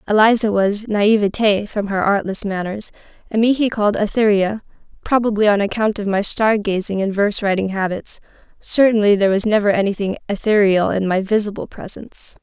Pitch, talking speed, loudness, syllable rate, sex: 205 Hz, 160 wpm, -17 LUFS, 5.6 syllables/s, female